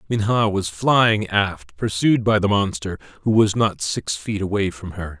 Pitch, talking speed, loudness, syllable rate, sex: 100 Hz, 185 wpm, -20 LUFS, 4.2 syllables/s, male